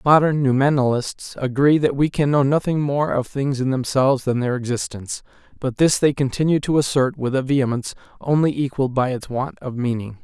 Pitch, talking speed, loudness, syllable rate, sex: 135 Hz, 190 wpm, -20 LUFS, 5.6 syllables/s, male